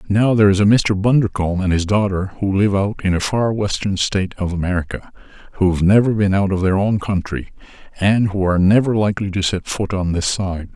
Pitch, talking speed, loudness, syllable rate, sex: 100 Hz, 210 wpm, -17 LUFS, 5.8 syllables/s, male